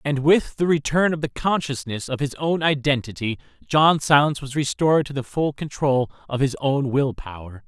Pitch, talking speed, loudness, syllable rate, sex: 140 Hz, 190 wpm, -21 LUFS, 5.1 syllables/s, male